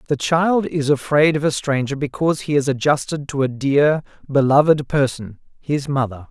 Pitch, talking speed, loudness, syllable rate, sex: 140 Hz, 170 wpm, -18 LUFS, 5.0 syllables/s, male